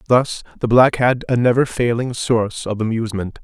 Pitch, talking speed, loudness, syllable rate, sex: 120 Hz, 175 wpm, -18 LUFS, 5.4 syllables/s, male